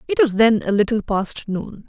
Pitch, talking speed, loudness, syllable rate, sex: 220 Hz, 225 wpm, -19 LUFS, 4.9 syllables/s, female